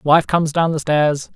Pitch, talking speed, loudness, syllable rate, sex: 155 Hz, 220 wpm, -17 LUFS, 4.6 syllables/s, male